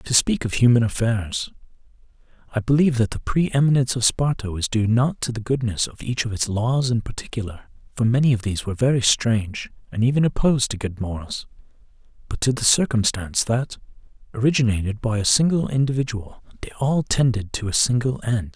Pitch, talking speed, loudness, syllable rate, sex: 120 Hz, 185 wpm, -21 LUFS, 5.9 syllables/s, male